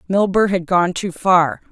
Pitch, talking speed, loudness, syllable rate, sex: 185 Hz, 175 wpm, -17 LUFS, 4.1 syllables/s, female